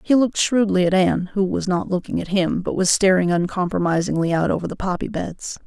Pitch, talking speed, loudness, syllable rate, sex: 185 Hz, 210 wpm, -20 LUFS, 5.9 syllables/s, female